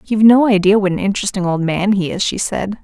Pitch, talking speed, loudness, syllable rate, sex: 200 Hz, 255 wpm, -15 LUFS, 6.3 syllables/s, female